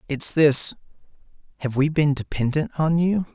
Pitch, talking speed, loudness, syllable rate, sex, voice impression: 150 Hz, 125 wpm, -21 LUFS, 4.6 syllables/s, male, masculine, adult-like, slightly middle-aged, slightly thick, tensed, slightly powerful, bright, hard, clear, fluent, slightly raspy, cool, very intellectual, refreshing, sincere, very calm, slightly mature, friendly, reassuring, slightly unique, slightly wild, slightly sweet, lively, slightly strict, slightly intense